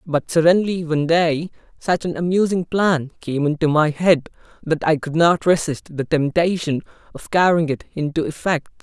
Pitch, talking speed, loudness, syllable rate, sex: 160 Hz, 165 wpm, -19 LUFS, 4.8 syllables/s, male